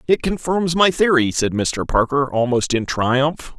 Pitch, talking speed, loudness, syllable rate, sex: 140 Hz, 165 wpm, -18 LUFS, 4.2 syllables/s, male